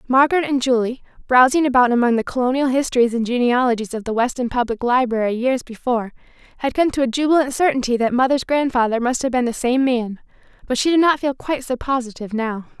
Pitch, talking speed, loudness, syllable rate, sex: 250 Hz, 195 wpm, -19 LUFS, 6.4 syllables/s, female